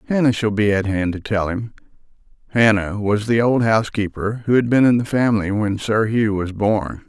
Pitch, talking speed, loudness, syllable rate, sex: 110 Hz, 205 wpm, -18 LUFS, 5.1 syllables/s, male